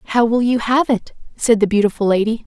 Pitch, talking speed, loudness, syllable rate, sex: 225 Hz, 210 wpm, -17 LUFS, 5.3 syllables/s, female